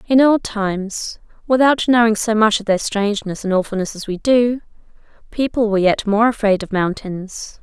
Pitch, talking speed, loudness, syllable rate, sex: 215 Hz, 175 wpm, -17 LUFS, 5.0 syllables/s, female